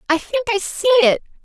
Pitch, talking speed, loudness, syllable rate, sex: 385 Hz, 210 wpm, -17 LUFS, 6.1 syllables/s, female